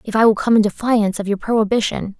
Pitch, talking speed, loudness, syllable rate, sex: 215 Hz, 245 wpm, -17 LUFS, 6.7 syllables/s, female